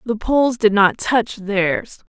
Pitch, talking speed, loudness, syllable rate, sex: 215 Hz, 170 wpm, -17 LUFS, 3.6 syllables/s, female